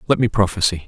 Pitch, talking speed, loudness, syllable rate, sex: 100 Hz, 205 wpm, -18 LUFS, 7.1 syllables/s, male